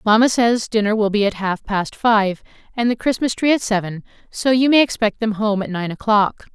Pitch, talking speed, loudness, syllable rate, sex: 215 Hz, 220 wpm, -18 LUFS, 5.2 syllables/s, female